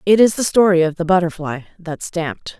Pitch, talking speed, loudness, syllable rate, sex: 180 Hz, 210 wpm, -17 LUFS, 5.6 syllables/s, female